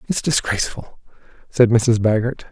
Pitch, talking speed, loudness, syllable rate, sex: 120 Hz, 120 wpm, -18 LUFS, 5.0 syllables/s, male